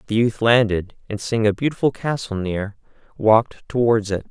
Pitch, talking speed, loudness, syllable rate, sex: 110 Hz, 165 wpm, -20 LUFS, 5.1 syllables/s, male